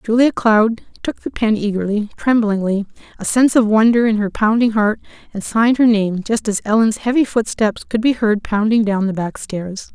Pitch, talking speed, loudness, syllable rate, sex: 220 Hz, 195 wpm, -16 LUFS, 5.1 syllables/s, female